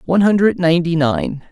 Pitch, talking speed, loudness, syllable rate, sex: 170 Hz, 160 wpm, -15 LUFS, 6.0 syllables/s, male